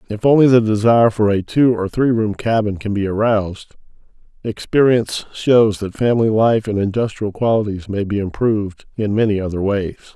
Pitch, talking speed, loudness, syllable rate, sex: 105 Hz, 170 wpm, -17 LUFS, 5.4 syllables/s, male